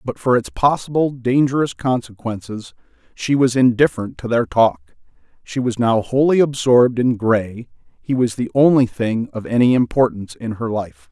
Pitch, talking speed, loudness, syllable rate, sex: 120 Hz, 160 wpm, -18 LUFS, 5.0 syllables/s, male